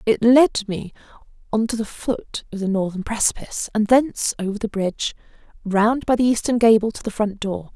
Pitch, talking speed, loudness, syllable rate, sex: 220 Hz, 195 wpm, -20 LUFS, 5.3 syllables/s, female